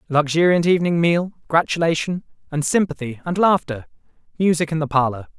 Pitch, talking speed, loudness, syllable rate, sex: 160 Hz, 135 wpm, -19 LUFS, 5.8 syllables/s, male